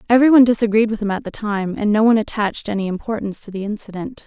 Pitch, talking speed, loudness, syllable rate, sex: 215 Hz, 225 wpm, -18 LUFS, 7.3 syllables/s, female